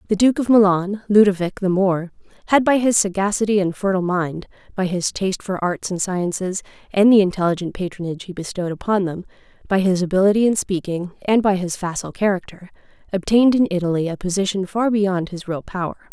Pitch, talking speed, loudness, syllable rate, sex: 190 Hz, 180 wpm, -19 LUFS, 6.0 syllables/s, female